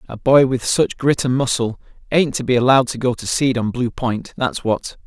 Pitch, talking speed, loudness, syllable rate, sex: 125 Hz, 235 wpm, -18 LUFS, 5.1 syllables/s, male